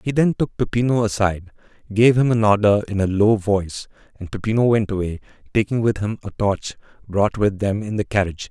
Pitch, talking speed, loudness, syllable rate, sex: 105 Hz, 195 wpm, -20 LUFS, 5.8 syllables/s, male